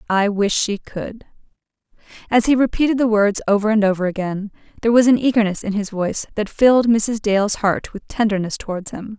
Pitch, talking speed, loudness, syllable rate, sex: 210 Hz, 190 wpm, -18 LUFS, 5.7 syllables/s, female